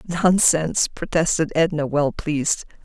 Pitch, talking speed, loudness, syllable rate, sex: 160 Hz, 105 wpm, -20 LUFS, 5.3 syllables/s, female